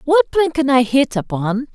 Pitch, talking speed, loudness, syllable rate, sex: 275 Hz, 205 wpm, -16 LUFS, 4.5 syllables/s, female